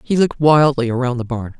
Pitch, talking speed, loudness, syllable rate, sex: 130 Hz, 225 wpm, -16 LUFS, 6.1 syllables/s, female